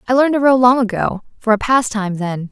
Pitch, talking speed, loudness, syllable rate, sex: 230 Hz, 215 wpm, -15 LUFS, 6.3 syllables/s, female